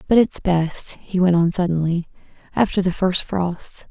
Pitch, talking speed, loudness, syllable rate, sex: 180 Hz, 170 wpm, -20 LUFS, 4.4 syllables/s, female